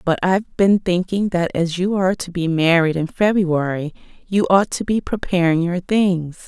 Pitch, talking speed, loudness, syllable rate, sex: 180 Hz, 185 wpm, -18 LUFS, 4.7 syllables/s, female